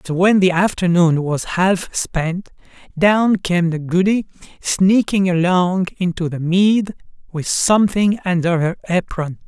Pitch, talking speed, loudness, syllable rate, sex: 180 Hz, 135 wpm, -17 LUFS, 4.0 syllables/s, male